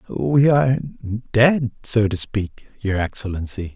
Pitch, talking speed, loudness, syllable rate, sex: 110 Hz, 130 wpm, -20 LUFS, 4.0 syllables/s, male